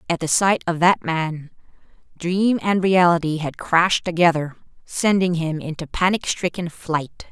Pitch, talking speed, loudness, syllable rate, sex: 170 Hz, 150 wpm, -20 LUFS, 4.4 syllables/s, female